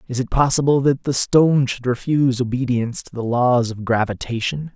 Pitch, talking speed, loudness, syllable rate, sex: 125 Hz, 175 wpm, -19 LUFS, 5.5 syllables/s, male